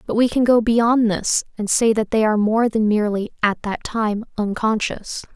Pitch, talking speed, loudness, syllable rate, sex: 220 Hz, 200 wpm, -19 LUFS, 4.8 syllables/s, female